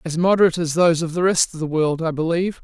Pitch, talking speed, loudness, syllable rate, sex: 165 Hz, 275 wpm, -19 LUFS, 7.1 syllables/s, female